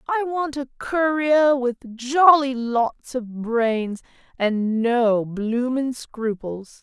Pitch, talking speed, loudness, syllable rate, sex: 250 Hz, 115 wpm, -21 LUFS, 2.7 syllables/s, female